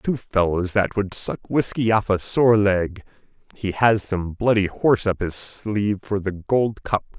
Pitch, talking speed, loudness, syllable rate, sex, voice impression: 100 Hz, 185 wpm, -21 LUFS, 4.2 syllables/s, male, very masculine, slightly old, slightly thick, slightly muffled, calm, mature, elegant, slightly sweet